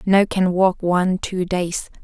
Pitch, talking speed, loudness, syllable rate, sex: 185 Hz, 175 wpm, -19 LUFS, 3.8 syllables/s, female